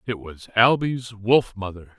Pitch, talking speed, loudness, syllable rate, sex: 110 Hz, 150 wpm, -21 LUFS, 4.0 syllables/s, male